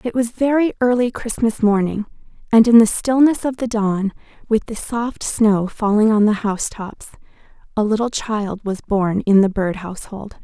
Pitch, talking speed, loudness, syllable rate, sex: 220 Hz, 170 wpm, -18 LUFS, 4.7 syllables/s, female